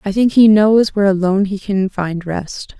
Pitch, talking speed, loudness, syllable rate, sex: 200 Hz, 215 wpm, -14 LUFS, 4.9 syllables/s, female